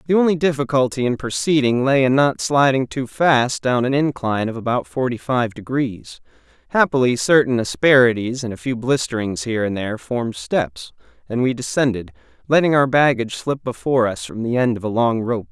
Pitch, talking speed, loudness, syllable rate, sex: 125 Hz, 180 wpm, -19 LUFS, 5.5 syllables/s, male